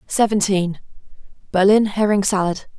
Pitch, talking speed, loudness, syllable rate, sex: 195 Hz, 65 wpm, -18 LUFS, 4.9 syllables/s, female